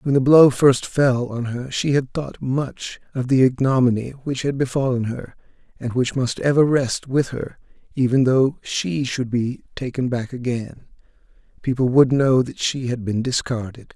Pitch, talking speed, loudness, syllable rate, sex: 130 Hz, 175 wpm, -20 LUFS, 4.4 syllables/s, male